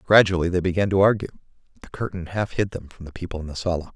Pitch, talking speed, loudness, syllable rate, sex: 90 Hz, 245 wpm, -23 LUFS, 7.3 syllables/s, male